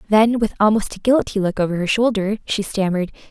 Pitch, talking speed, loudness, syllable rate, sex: 205 Hz, 200 wpm, -19 LUFS, 6.1 syllables/s, female